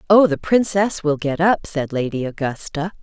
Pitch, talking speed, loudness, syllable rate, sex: 165 Hz, 180 wpm, -19 LUFS, 4.7 syllables/s, female